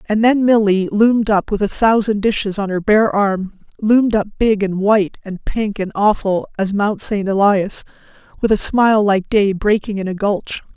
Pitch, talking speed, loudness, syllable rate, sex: 205 Hz, 185 wpm, -16 LUFS, 4.8 syllables/s, female